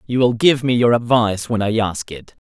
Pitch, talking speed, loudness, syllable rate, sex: 115 Hz, 245 wpm, -17 LUFS, 5.4 syllables/s, male